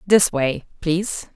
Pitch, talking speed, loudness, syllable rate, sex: 170 Hz, 135 wpm, -21 LUFS, 3.7 syllables/s, female